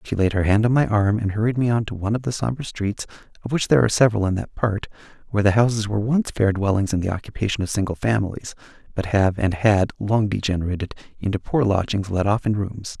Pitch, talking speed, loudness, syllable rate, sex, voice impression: 105 Hz, 235 wpm, -21 LUFS, 6.5 syllables/s, male, masculine, adult-like, slightly soft, slightly muffled, cool, sincere, calm, slightly sweet, kind